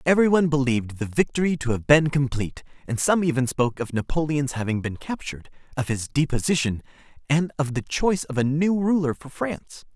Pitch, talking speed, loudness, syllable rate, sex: 140 Hz, 180 wpm, -23 LUFS, 6.0 syllables/s, male